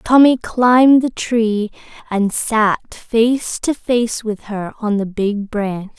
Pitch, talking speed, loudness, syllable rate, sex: 225 Hz, 150 wpm, -16 LUFS, 3.1 syllables/s, female